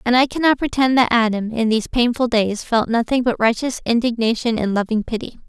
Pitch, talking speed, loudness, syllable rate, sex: 235 Hz, 195 wpm, -18 LUFS, 5.7 syllables/s, female